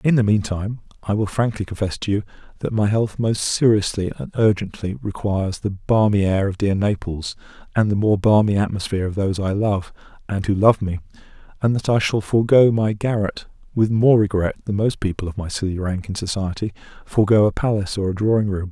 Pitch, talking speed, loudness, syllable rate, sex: 100 Hz, 200 wpm, -20 LUFS, 5.7 syllables/s, male